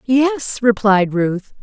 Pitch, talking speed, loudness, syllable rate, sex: 225 Hz, 110 wpm, -16 LUFS, 2.7 syllables/s, female